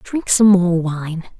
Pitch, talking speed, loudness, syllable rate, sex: 185 Hz, 170 wpm, -15 LUFS, 3.3 syllables/s, female